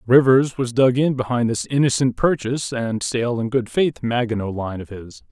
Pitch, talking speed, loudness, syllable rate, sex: 120 Hz, 190 wpm, -20 LUFS, 4.9 syllables/s, male